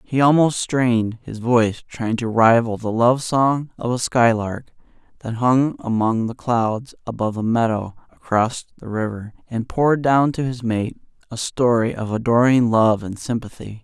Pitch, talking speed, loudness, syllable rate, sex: 120 Hz, 165 wpm, -19 LUFS, 4.5 syllables/s, male